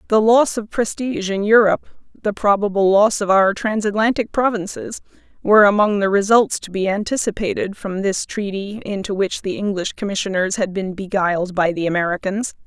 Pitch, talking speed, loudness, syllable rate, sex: 200 Hz, 165 wpm, -18 LUFS, 5.3 syllables/s, female